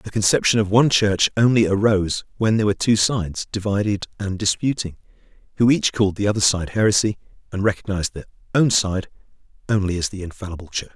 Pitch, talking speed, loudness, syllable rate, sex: 100 Hz, 175 wpm, -20 LUFS, 6.4 syllables/s, male